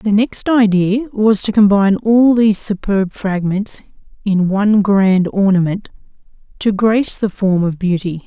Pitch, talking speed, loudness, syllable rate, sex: 200 Hz, 145 wpm, -14 LUFS, 4.4 syllables/s, female